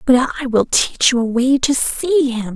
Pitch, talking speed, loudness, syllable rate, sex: 255 Hz, 235 wpm, -16 LUFS, 4.2 syllables/s, female